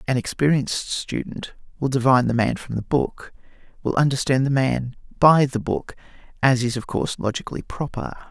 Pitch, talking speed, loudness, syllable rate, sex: 130 Hz, 165 wpm, -22 LUFS, 5.5 syllables/s, male